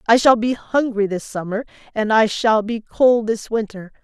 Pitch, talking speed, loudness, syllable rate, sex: 220 Hz, 195 wpm, -19 LUFS, 4.6 syllables/s, female